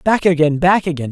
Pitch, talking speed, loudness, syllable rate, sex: 170 Hz, 215 wpm, -15 LUFS, 5.4 syllables/s, male